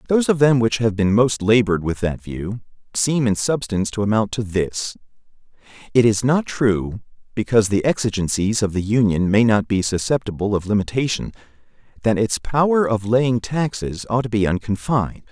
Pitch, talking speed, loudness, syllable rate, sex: 110 Hz, 170 wpm, -19 LUFS, 5.3 syllables/s, male